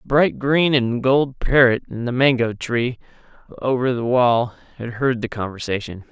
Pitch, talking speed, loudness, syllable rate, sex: 125 Hz, 165 wpm, -19 LUFS, 4.5 syllables/s, male